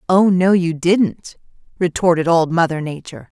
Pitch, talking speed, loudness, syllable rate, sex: 170 Hz, 140 wpm, -16 LUFS, 4.7 syllables/s, female